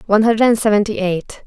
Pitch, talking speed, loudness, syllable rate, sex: 210 Hz, 165 wpm, -16 LUFS, 6.1 syllables/s, female